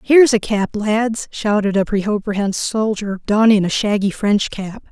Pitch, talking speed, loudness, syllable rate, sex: 210 Hz, 160 wpm, -17 LUFS, 4.3 syllables/s, female